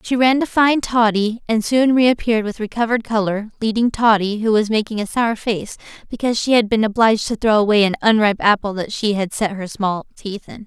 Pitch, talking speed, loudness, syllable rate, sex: 220 Hz, 215 wpm, -17 LUFS, 5.7 syllables/s, female